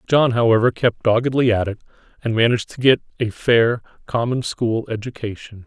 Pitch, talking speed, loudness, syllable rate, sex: 115 Hz, 160 wpm, -19 LUFS, 5.5 syllables/s, male